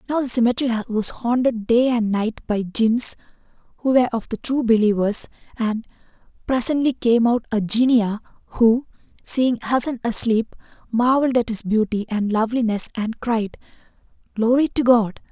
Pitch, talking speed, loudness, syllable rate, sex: 230 Hz, 145 wpm, -20 LUFS, 5.0 syllables/s, female